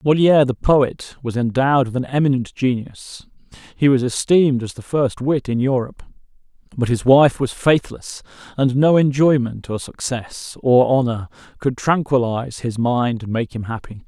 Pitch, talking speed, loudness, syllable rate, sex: 130 Hz, 160 wpm, -18 LUFS, 4.8 syllables/s, male